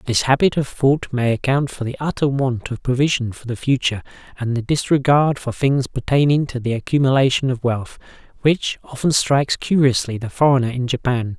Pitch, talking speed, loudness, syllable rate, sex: 130 Hz, 180 wpm, -19 LUFS, 5.4 syllables/s, male